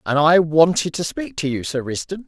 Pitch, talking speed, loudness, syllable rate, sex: 165 Hz, 235 wpm, -19 LUFS, 5.1 syllables/s, male